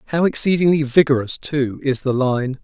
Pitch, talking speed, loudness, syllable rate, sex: 140 Hz, 160 wpm, -18 LUFS, 5.1 syllables/s, male